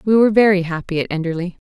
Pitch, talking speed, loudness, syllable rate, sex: 185 Hz, 215 wpm, -17 LUFS, 7.3 syllables/s, female